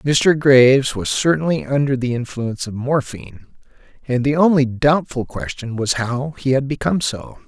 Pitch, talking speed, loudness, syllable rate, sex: 130 Hz, 160 wpm, -18 LUFS, 4.9 syllables/s, male